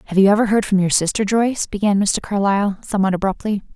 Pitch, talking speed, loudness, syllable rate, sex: 200 Hz, 210 wpm, -18 LUFS, 6.8 syllables/s, female